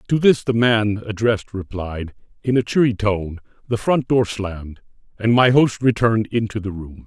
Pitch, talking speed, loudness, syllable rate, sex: 110 Hz, 180 wpm, -19 LUFS, 4.9 syllables/s, male